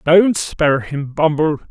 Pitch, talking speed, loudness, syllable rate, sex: 155 Hz, 140 wpm, -16 LUFS, 3.9 syllables/s, male